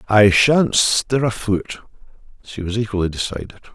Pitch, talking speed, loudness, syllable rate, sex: 110 Hz, 145 wpm, -17 LUFS, 4.7 syllables/s, male